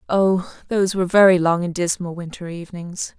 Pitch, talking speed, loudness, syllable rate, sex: 180 Hz, 170 wpm, -19 LUFS, 5.7 syllables/s, female